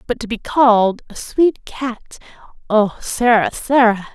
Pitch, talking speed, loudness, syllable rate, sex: 230 Hz, 145 wpm, -16 LUFS, 3.9 syllables/s, female